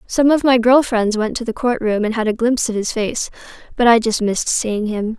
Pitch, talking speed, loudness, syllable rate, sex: 225 Hz, 265 wpm, -17 LUFS, 5.4 syllables/s, female